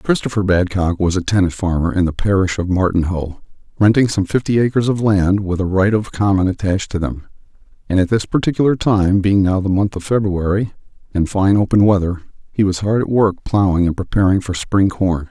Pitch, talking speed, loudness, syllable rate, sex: 95 Hz, 200 wpm, -16 LUFS, 5.5 syllables/s, male